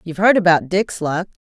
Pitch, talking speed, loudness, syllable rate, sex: 175 Hz, 205 wpm, -17 LUFS, 5.9 syllables/s, female